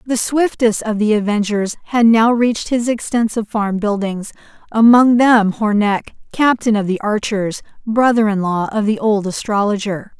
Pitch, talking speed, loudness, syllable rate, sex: 215 Hz, 155 wpm, -16 LUFS, 4.6 syllables/s, female